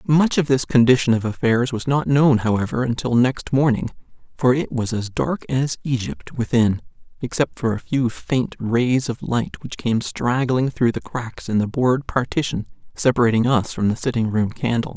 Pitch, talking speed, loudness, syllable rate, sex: 125 Hz, 185 wpm, -20 LUFS, 4.7 syllables/s, male